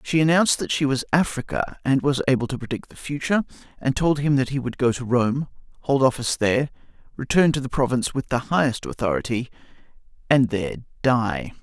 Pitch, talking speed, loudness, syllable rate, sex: 130 Hz, 185 wpm, -22 LUFS, 6.0 syllables/s, male